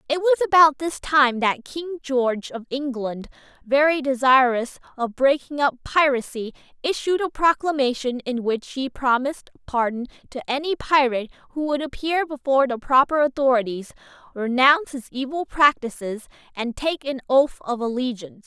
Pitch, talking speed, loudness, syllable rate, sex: 270 Hz, 145 wpm, -21 LUFS, 5.4 syllables/s, female